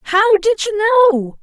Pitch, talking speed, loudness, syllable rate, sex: 405 Hz, 170 wpm, -13 LUFS, 7.4 syllables/s, female